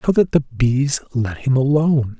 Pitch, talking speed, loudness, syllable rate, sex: 135 Hz, 190 wpm, -18 LUFS, 4.8 syllables/s, male